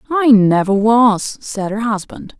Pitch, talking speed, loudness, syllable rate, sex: 220 Hz, 150 wpm, -14 LUFS, 3.7 syllables/s, female